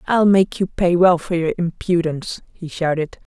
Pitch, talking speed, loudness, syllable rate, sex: 175 Hz, 180 wpm, -18 LUFS, 4.8 syllables/s, female